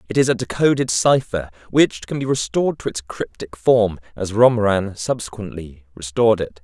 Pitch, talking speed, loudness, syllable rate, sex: 110 Hz, 165 wpm, -19 LUFS, 5.2 syllables/s, male